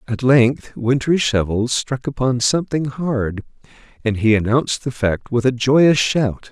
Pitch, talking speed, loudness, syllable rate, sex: 125 Hz, 155 wpm, -18 LUFS, 4.2 syllables/s, male